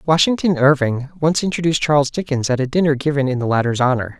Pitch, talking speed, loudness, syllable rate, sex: 145 Hz, 200 wpm, -17 LUFS, 6.5 syllables/s, male